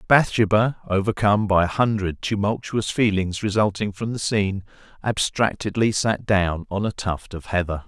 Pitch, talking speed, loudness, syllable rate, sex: 100 Hz, 145 wpm, -22 LUFS, 4.9 syllables/s, male